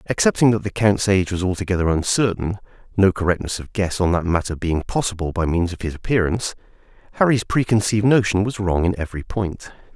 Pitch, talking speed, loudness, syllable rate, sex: 95 Hz, 180 wpm, -20 LUFS, 6.2 syllables/s, male